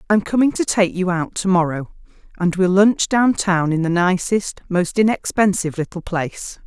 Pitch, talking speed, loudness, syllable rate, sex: 185 Hz, 180 wpm, -18 LUFS, 4.9 syllables/s, female